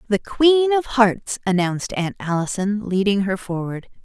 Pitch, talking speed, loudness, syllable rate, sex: 210 Hz, 150 wpm, -20 LUFS, 4.4 syllables/s, female